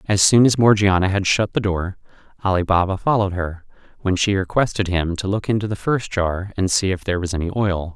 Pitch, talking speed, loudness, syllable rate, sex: 95 Hz, 220 wpm, -19 LUFS, 5.7 syllables/s, male